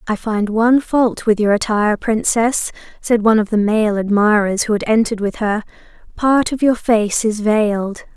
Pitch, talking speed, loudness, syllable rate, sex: 215 Hz, 185 wpm, -16 LUFS, 5.0 syllables/s, female